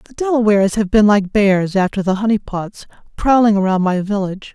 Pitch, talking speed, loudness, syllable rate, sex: 205 Hz, 185 wpm, -15 LUFS, 5.6 syllables/s, female